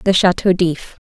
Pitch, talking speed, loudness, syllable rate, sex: 180 Hz, 170 wpm, -16 LUFS, 4.3 syllables/s, female